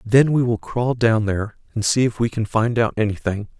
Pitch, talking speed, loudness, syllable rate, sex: 115 Hz, 235 wpm, -20 LUFS, 5.3 syllables/s, male